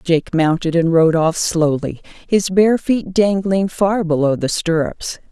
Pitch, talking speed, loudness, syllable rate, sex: 175 Hz, 160 wpm, -16 LUFS, 3.9 syllables/s, female